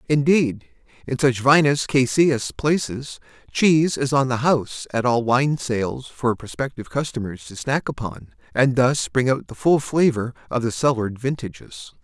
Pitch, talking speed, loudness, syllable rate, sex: 125 Hz, 160 wpm, -21 LUFS, 4.6 syllables/s, male